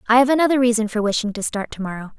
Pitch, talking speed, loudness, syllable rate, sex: 230 Hz, 275 wpm, -19 LUFS, 7.7 syllables/s, female